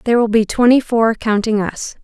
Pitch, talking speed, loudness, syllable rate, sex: 225 Hz, 205 wpm, -15 LUFS, 5.4 syllables/s, female